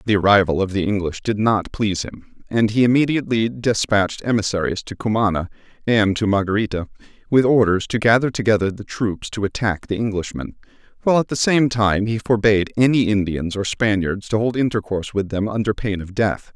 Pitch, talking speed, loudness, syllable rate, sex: 105 Hz, 180 wpm, -19 LUFS, 5.7 syllables/s, male